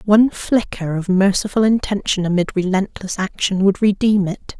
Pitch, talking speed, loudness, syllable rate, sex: 195 Hz, 145 wpm, -18 LUFS, 4.9 syllables/s, female